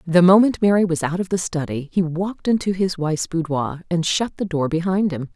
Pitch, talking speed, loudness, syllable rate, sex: 175 Hz, 225 wpm, -20 LUFS, 5.5 syllables/s, female